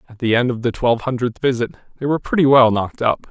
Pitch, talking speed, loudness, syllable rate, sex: 125 Hz, 255 wpm, -18 LUFS, 7.1 syllables/s, male